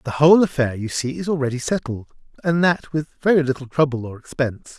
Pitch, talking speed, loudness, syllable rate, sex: 140 Hz, 200 wpm, -20 LUFS, 6.0 syllables/s, male